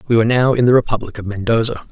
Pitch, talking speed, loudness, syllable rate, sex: 115 Hz, 250 wpm, -16 LUFS, 7.5 syllables/s, male